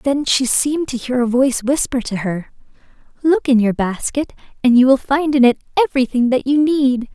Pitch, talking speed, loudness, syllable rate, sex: 260 Hz, 200 wpm, -16 LUFS, 5.4 syllables/s, female